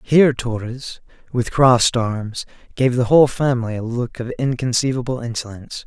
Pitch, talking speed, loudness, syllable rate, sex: 120 Hz, 145 wpm, -19 LUFS, 5.3 syllables/s, male